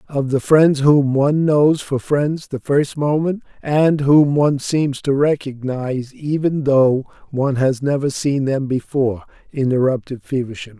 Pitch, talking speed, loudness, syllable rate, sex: 140 Hz, 150 wpm, -18 LUFS, 4.3 syllables/s, male